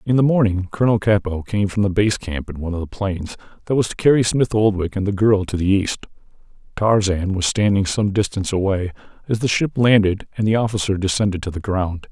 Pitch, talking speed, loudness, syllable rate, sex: 100 Hz, 220 wpm, -19 LUFS, 5.9 syllables/s, male